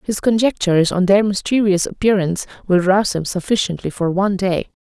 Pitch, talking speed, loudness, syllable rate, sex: 190 Hz, 160 wpm, -17 LUFS, 5.9 syllables/s, female